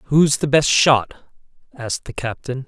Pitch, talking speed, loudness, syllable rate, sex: 135 Hz, 155 wpm, -18 LUFS, 4.2 syllables/s, male